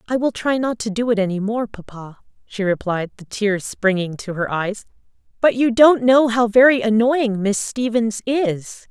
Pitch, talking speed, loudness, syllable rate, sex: 220 Hz, 190 wpm, -18 LUFS, 4.5 syllables/s, female